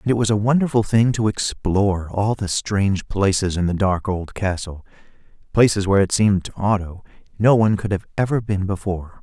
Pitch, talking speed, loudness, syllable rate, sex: 100 Hz, 195 wpm, -20 LUFS, 5.7 syllables/s, male